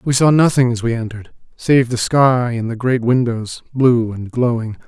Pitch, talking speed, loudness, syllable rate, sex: 120 Hz, 195 wpm, -16 LUFS, 4.8 syllables/s, male